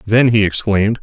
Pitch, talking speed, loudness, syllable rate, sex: 105 Hz, 175 wpm, -14 LUFS, 5.6 syllables/s, male